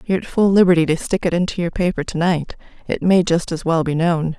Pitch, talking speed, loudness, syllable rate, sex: 170 Hz, 245 wpm, -18 LUFS, 6.0 syllables/s, female